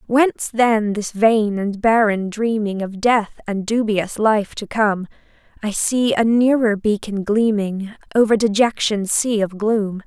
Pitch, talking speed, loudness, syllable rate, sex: 215 Hz, 150 wpm, -18 LUFS, 3.9 syllables/s, female